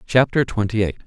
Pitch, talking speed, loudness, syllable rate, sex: 110 Hz, 170 wpm, -20 LUFS, 6.0 syllables/s, male